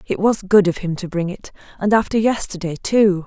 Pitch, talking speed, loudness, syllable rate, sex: 190 Hz, 220 wpm, -18 LUFS, 5.3 syllables/s, female